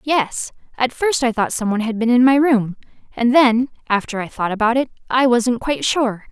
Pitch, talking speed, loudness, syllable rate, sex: 240 Hz, 220 wpm, -18 LUFS, 5.2 syllables/s, female